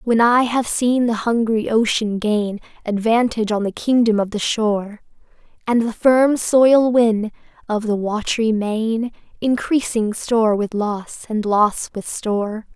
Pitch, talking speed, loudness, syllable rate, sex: 225 Hz, 150 wpm, -18 LUFS, 4.1 syllables/s, female